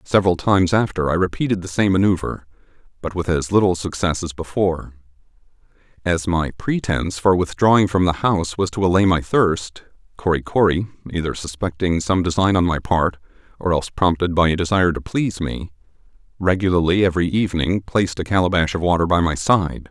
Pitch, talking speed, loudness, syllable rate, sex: 90 Hz, 170 wpm, -19 LUFS, 5.9 syllables/s, male